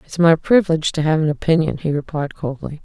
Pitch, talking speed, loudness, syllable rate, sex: 155 Hz, 230 wpm, -18 LUFS, 6.5 syllables/s, female